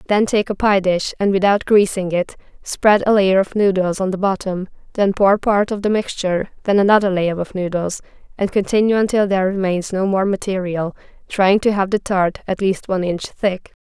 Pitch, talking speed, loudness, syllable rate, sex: 195 Hz, 200 wpm, -18 LUFS, 5.3 syllables/s, female